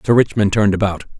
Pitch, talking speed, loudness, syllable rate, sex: 105 Hz, 200 wpm, -16 LUFS, 7.2 syllables/s, male